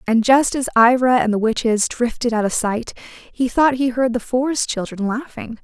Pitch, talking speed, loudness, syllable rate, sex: 240 Hz, 200 wpm, -18 LUFS, 4.8 syllables/s, female